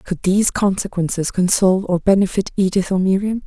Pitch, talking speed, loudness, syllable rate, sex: 190 Hz, 155 wpm, -17 LUFS, 5.6 syllables/s, female